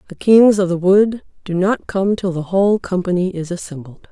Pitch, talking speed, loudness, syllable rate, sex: 185 Hz, 205 wpm, -16 LUFS, 5.1 syllables/s, female